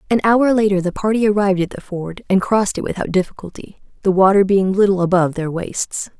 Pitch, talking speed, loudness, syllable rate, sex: 195 Hz, 205 wpm, -17 LUFS, 6.1 syllables/s, female